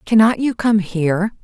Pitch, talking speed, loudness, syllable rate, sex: 205 Hz, 165 wpm, -17 LUFS, 4.9 syllables/s, female